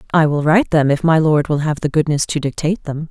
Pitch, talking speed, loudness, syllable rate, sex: 155 Hz, 270 wpm, -16 LUFS, 6.4 syllables/s, female